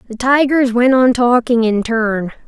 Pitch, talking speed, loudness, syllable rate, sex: 240 Hz, 170 wpm, -14 LUFS, 4.2 syllables/s, female